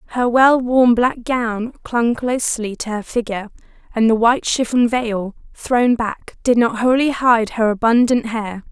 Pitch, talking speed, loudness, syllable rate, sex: 235 Hz, 165 wpm, -17 LUFS, 4.5 syllables/s, female